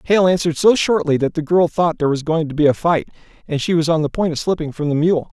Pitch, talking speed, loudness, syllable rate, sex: 160 Hz, 290 wpm, -17 LUFS, 6.4 syllables/s, male